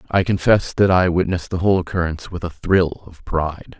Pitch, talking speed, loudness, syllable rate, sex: 85 Hz, 205 wpm, -19 LUFS, 6.0 syllables/s, male